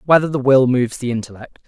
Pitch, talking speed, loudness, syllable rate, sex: 130 Hz, 215 wpm, -16 LUFS, 6.8 syllables/s, male